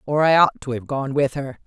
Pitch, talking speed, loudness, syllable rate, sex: 135 Hz, 290 wpm, -20 LUFS, 5.3 syllables/s, female